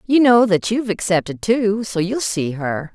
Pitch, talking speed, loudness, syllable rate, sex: 205 Hz, 205 wpm, -18 LUFS, 4.6 syllables/s, female